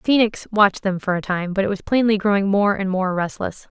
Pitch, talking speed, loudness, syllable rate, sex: 200 Hz, 255 wpm, -20 LUFS, 6.5 syllables/s, female